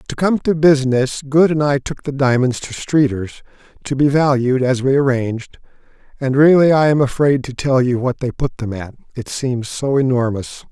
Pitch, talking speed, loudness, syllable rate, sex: 135 Hz, 195 wpm, -16 LUFS, 4.9 syllables/s, male